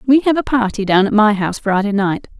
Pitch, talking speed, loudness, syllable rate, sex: 220 Hz, 250 wpm, -15 LUFS, 6.0 syllables/s, female